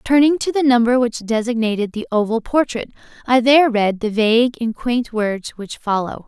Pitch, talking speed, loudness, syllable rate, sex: 235 Hz, 180 wpm, -17 LUFS, 5.1 syllables/s, female